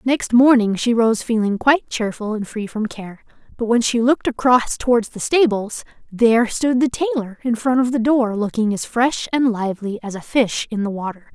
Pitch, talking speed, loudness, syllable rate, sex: 230 Hz, 205 wpm, -18 LUFS, 5.0 syllables/s, female